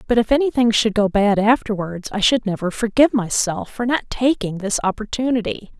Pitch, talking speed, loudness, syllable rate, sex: 220 Hz, 185 wpm, -19 LUFS, 5.5 syllables/s, female